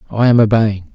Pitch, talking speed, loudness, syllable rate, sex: 110 Hz, 190 wpm, -13 LUFS, 5.5 syllables/s, male